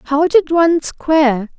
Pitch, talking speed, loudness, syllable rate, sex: 310 Hz, 150 wpm, -14 LUFS, 4.0 syllables/s, female